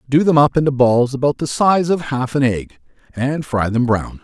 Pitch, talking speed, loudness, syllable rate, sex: 135 Hz, 225 wpm, -17 LUFS, 4.9 syllables/s, male